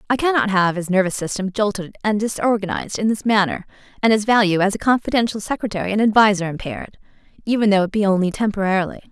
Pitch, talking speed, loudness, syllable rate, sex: 205 Hz, 185 wpm, -19 LUFS, 6.8 syllables/s, female